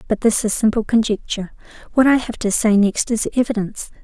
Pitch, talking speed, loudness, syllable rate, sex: 220 Hz, 195 wpm, -18 LUFS, 6.2 syllables/s, female